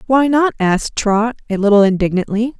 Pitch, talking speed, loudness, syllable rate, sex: 220 Hz, 160 wpm, -15 LUFS, 5.4 syllables/s, female